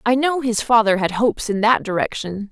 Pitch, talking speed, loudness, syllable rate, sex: 225 Hz, 215 wpm, -18 LUFS, 5.4 syllables/s, female